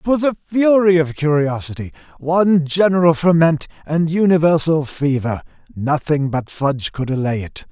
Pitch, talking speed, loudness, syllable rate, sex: 160 Hz, 125 wpm, -17 LUFS, 4.7 syllables/s, male